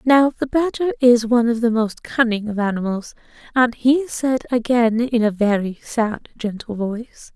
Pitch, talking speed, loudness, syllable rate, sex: 235 Hz, 170 wpm, -19 LUFS, 4.6 syllables/s, female